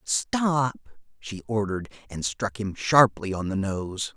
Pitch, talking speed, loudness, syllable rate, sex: 105 Hz, 145 wpm, -25 LUFS, 3.6 syllables/s, male